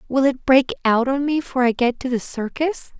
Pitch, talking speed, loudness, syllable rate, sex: 260 Hz, 240 wpm, -20 LUFS, 4.9 syllables/s, female